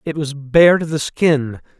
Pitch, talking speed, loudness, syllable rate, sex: 145 Hz, 200 wpm, -16 LUFS, 3.9 syllables/s, male